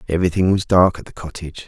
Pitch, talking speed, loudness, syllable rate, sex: 90 Hz, 215 wpm, -17 LUFS, 7.4 syllables/s, male